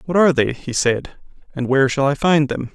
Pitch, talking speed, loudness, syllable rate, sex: 140 Hz, 240 wpm, -18 LUFS, 5.8 syllables/s, male